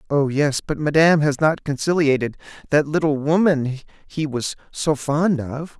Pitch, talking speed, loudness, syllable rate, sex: 145 Hz, 155 wpm, -20 LUFS, 4.6 syllables/s, male